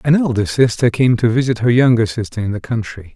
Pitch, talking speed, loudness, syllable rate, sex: 115 Hz, 230 wpm, -16 LUFS, 5.9 syllables/s, male